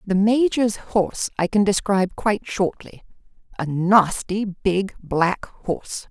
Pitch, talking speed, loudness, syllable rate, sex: 195 Hz, 120 wpm, -21 LUFS, 4.0 syllables/s, female